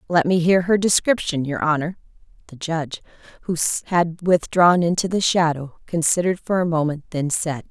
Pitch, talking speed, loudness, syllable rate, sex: 165 Hz, 165 wpm, -20 LUFS, 5.4 syllables/s, female